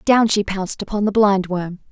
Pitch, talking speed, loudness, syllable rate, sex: 200 Hz, 190 wpm, -19 LUFS, 5.3 syllables/s, female